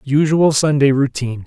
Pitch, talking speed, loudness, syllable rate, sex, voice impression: 140 Hz, 125 wpm, -15 LUFS, 5.1 syllables/s, male, very masculine, very middle-aged, very thick, slightly tensed, very powerful, slightly bright, soft, muffled, slightly fluent, raspy, cool, intellectual, slightly refreshing, sincere, very calm, very mature, friendly, reassuring, very unique, slightly elegant, wild, sweet, lively, kind, slightly intense